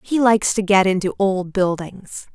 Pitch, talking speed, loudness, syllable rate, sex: 195 Hz, 180 wpm, -18 LUFS, 4.6 syllables/s, female